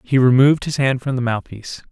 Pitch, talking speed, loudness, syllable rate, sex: 125 Hz, 220 wpm, -17 LUFS, 6.3 syllables/s, male